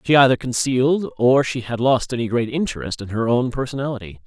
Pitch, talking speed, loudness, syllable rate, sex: 125 Hz, 195 wpm, -20 LUFS, 5.8 syllables/s, male